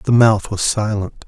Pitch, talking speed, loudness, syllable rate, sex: 105 Hz, 190 wpm, -17 LUFS, 4.1 syllables/s, male